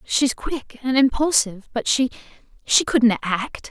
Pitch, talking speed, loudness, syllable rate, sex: 255 Hz, 130 wpm, -20 LUFS, 4.1 syllables/s, female